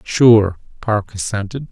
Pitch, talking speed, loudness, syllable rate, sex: 110 Hz, 105 wpm, -16 LUFS, 3.6 syllables/s, male